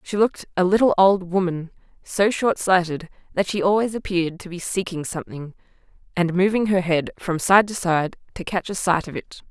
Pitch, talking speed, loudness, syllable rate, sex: 185 Hz, 195 wpm, -21 LUFS, 5.3 syllables/s, female